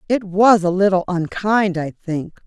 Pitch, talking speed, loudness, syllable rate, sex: 190 Hz, 170 wpm, -18 LUFS, 4.3 syllables/s, female